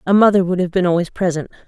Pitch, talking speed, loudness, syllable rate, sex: 180 Hz, 250 wpm, -16 LUFS, 7.1 syllables/s, female